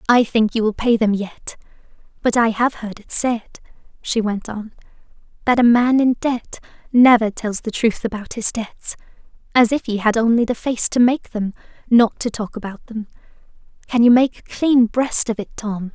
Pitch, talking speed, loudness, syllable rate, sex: 225 Hz, 190 wpm, -18 LUFS, 4.7 syllables/s, female